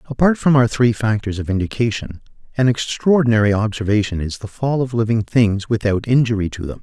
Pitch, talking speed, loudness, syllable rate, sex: 115 Hz, 175 wpm, -18 LUFS, 5.7 syllables/s, male